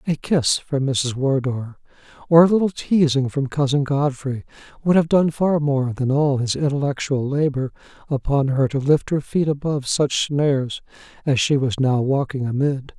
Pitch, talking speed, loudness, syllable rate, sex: 140 Hz, 170 wpm, -20 LUFS, 4.7 syllables/s, male